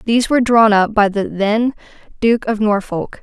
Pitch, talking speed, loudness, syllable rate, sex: 215 Hz, 185 wpm, -15 LUFS, 4.9 syllables/s, female